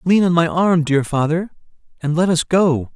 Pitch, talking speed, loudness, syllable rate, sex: 165 Hz, 205 wpm, -17 LUFS, 4.7 syllables/s, male